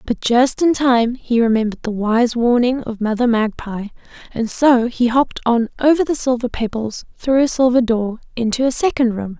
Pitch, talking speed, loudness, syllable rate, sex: 240 Hz, 185 wpm, -17 LUFS, 5.0 syllables/s, female